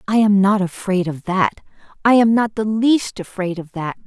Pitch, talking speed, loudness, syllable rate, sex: 200 Hz, 190 wpm, -18 LUFS, 4.7 syllables/s, female